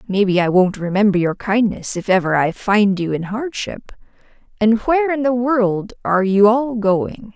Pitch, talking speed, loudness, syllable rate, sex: 210 Hz, 180 wpm, -17 LUFS, 4.7 syllables/s, female